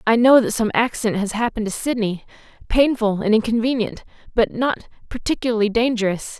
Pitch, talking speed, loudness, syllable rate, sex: 225 Hz, 140 wpm, -20 LUFS, 5.8 syllables/s, female